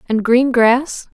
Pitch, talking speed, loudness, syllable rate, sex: 245 Hz, 150 wpm, -14 LUFS, 3.2 syllables/s, female